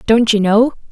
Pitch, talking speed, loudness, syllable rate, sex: 225 Hz, 195 wpm, -13 LUFS, 4.7 syllables/s, female